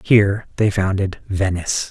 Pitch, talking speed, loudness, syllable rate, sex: 100 Hz, 125 wpm, -19 LUFS, 4.8 syllables/s, male